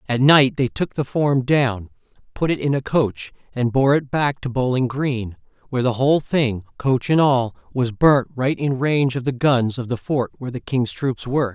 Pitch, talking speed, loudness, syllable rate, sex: 130 Hz, 215 wpm, -20 LUFS, 4.8 syllables/s, male